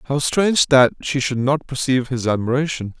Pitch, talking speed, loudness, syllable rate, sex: 135 Hz, 180 wpm, -18 LUFS, 5.6 syllables/s, male